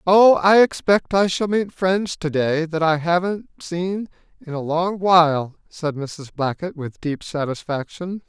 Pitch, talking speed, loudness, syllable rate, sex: 170 Hz, 160 wpm, -20 LUFS, 4.0 syllables/s, male